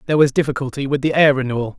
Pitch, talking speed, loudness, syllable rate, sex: 135 Hz, 235 wpm, -17 LUFS, 8.0 syllables/s, male